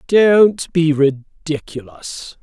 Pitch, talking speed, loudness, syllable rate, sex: 155 Hz, 75 wpm, -15 LUFS, 2.6 syllables/s, male